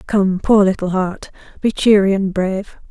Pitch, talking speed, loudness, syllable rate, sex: 195 Hz, 165 wpm, -16 LUFS, 4.7 syllables/s, female